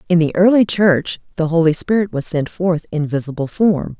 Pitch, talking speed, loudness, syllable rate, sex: 170 Hz, 195 wpm, -16 LUFS, 5.1 syllables/s, female